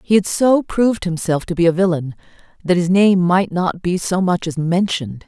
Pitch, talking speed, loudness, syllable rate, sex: 180 Hz, 215 wpm, -17 LUFS, 5.1 syllables/s, female